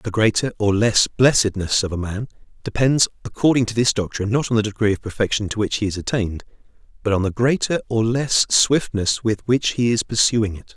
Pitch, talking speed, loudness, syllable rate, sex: 110 Hz, 205 wpm, -19 LUFS, 5.6 syllables/s, male